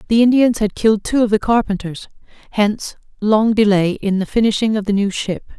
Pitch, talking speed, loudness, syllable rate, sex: 210 Hz, 195 wpm, -16 LUFS, 5.7 syllables/s, female